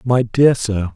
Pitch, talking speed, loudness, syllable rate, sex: 115 Hz, 190 wpm, -16 LUFS, 3.5 syllables/s, male